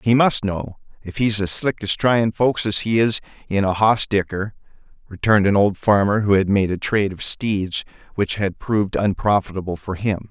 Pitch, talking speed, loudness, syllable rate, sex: 100 Hz, 200 wpm, -19 LUFS, 5.0 syllables/s, male